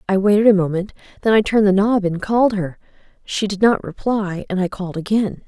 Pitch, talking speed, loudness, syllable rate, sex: 200 Hz, 220 wpm, -18 LUFS, 6.0 syllables/s, female